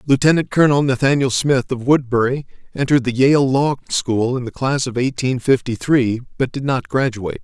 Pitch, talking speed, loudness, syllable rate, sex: 130 Hz, 180 wpm, -17 LUFS, 5.4 syllables/s, male